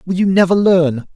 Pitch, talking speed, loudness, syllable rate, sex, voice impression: 180 Hz, 210 wpm, -13 LUFS, 5.1 syllables/s, male, masculine, slightly young, adult-like, slightly thick, tensed, slightly powerful, very bright, hard, clear, fluent, cool, slightly intellectual, very refreshing, sincere, slightly calm, friendly, reassuring, unique, slightly elegant, wild, slightly sweet, lively, kind, slightly intense, slightly light